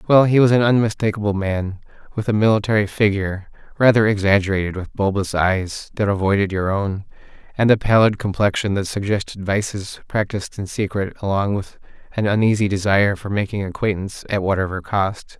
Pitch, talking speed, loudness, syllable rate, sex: 100 Hz, 155 wpm, -19 LUFS, 5.7 syllables/s, male